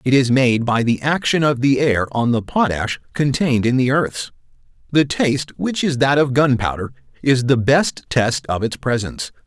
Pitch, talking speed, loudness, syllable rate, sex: 130 Hz, 190 wpm, -18 LUFS, 2.9 syllables/s, male